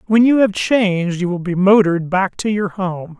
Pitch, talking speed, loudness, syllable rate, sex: 190 Hz, 225 wpm, -16 LUFS, 5.0 syllables/s, male